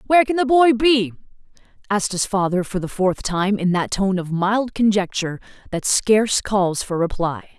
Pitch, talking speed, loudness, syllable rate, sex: 205 Hz, 180 wpm, -19 LUFS, 4.9 syllables/s, female